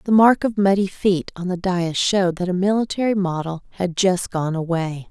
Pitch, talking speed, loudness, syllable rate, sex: 185 Hz, 200 wpm, -20 LUFS, 5.0 syllables/s, female